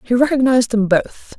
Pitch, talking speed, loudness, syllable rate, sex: 240 Hz, 175 wpm, -15 LUFS, 5.5 syllables/s, female